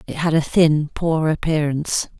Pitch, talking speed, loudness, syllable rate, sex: 155 Hz, 165 wpm, -19 LUFS, 4.7 syllables/s, female